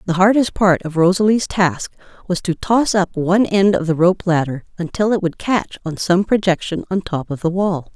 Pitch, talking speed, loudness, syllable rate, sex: 185 Hz, 210 wpm, -17 LUFS, 5.0 syllables/s, female